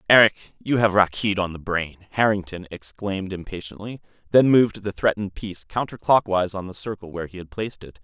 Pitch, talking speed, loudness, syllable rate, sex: 100 Hz, 180 wpm, -22 LUFS, 6.1 syllables/s, male